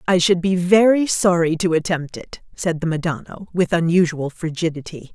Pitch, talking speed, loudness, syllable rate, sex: 170 Hz, 165 wpm, -19 LUFS, 5.1 syllables/s, female